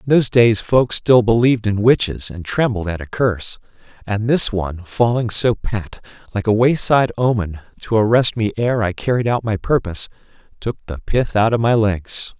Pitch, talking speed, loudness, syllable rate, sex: 110 Hz, 190 wpm, -17 LUFS, 5.2 syllables/s, male